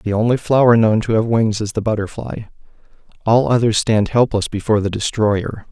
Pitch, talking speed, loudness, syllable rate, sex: 110 Hz, 180 wpm, -17 LUFS, 5.3 syllables/s, male